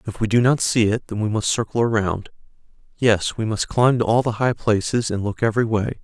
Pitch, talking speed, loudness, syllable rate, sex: 110 Hz, 240 wpm, -20 LUFS, 5.6 syllables/s, male